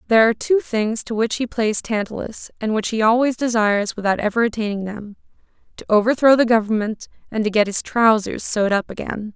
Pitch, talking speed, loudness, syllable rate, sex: 220 Hz, 195 wpm, -19 LUFS, 5.9 syllables/s, female